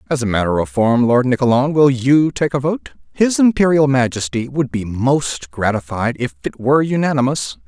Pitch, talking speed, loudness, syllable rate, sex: 130 Hz, 180 wpm, -16 LUFS, 5.0 syllables/s, male